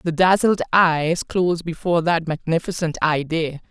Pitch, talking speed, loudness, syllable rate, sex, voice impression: 165 Hz, 130 wpm, -20 LUFS, 4.7 syllables/s, female, slightly feminine, adult-like, intellectual, slightly calm, slightly strict